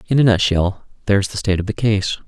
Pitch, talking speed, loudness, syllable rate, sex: 100 Hz, 265 wpm, -18 LUFS, 6.5 syllables/s, male